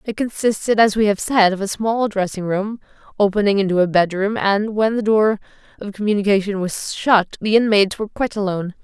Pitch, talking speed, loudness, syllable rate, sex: 205 Hz, 190 wpm, -18 LUFS, 5.8 syllables/s, female